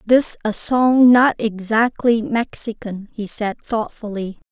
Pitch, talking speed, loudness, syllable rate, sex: 225 Hz, 120 wpm, -18 LUFS, 3.6 syllables/s, female